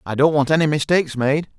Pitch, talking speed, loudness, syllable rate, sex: 145 Hz, 225 wpm, -18 LUFS, 6.4 syllables/s, male